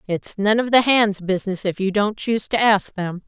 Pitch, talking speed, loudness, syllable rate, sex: 205 Hz, 240 wpm, -19 LUFS, 5.2 syllables/s, female